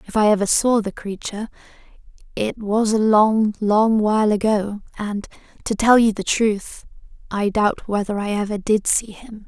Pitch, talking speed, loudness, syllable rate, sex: 210 Hz, 170 wpm, -19 LUFS, 4.6 syllables/s, female